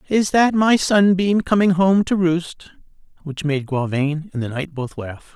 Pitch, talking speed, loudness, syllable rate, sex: 170 Hz, 180 wpm, -18 LUFS, 4.1 syllables/s, male